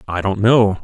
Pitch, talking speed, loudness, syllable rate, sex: 105 Hz, 215 wpm, -15 LUFS, 4.5 syllables/s, male